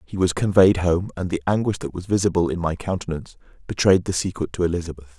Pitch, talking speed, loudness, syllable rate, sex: 90 Hz, 210 wpm, -21 LUFS, 6.5 syllables/s, male